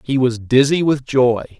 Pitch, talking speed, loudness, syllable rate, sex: 130 Hz, 190 wpm, -16 LUFS, 4.3 syllables/s, male